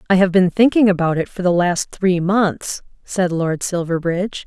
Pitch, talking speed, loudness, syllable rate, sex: 185 Hz, 190 wpm, -17 LUFS, 4.7 syllables/s, female